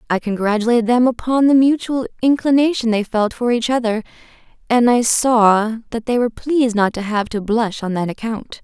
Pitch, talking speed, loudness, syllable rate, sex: 235 Hz, 190 wpm, -17 LUFS, 5.4 syllables/s, female